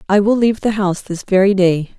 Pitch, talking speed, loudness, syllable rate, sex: 200 Hz, 240 wpm, -15 LUFS, 6.3 syllables/s, female